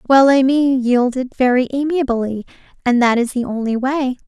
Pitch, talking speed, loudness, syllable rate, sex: 255 Hz, 170 wpm, -16 LUFS, 5.1 syllables/s, female